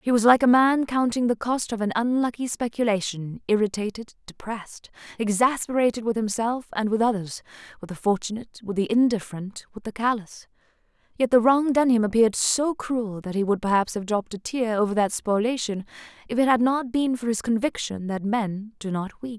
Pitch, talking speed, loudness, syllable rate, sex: 225 Hz, 185 wpm, -24 LUFS, 5.5 syllables/s, female